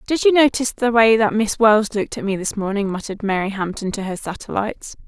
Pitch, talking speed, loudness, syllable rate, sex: 215 Hz, 225 wpm, -19 LUFS, 6.2 syllables/s, female